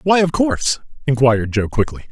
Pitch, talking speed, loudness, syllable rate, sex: 145 Hz, 170 wpm, -17 LUFS, 5.8 syllables/s, male